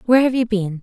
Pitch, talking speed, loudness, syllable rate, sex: 220 Hz, 290 wpm, -18 LUFS, 7.3 syllables/s, female